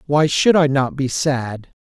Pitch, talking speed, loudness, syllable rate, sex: 140 Hz, 190 wpm, -17 LUFS, 3.8 syllables/s, male